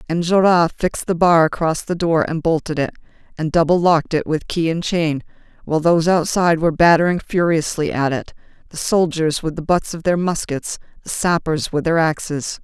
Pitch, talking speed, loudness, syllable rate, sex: 165 Hz, 185 wpm, -18 LUFS, 5.4 syllables/s, female